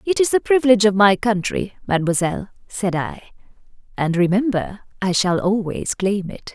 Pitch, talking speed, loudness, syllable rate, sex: 205 Hz, 155 wpm, -19 LUFS, 5.2 syllables/s, female